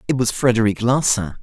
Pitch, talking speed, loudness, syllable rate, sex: 120 Hz, 170 wpm, -18 LUFS, 5.7 syllables/s, male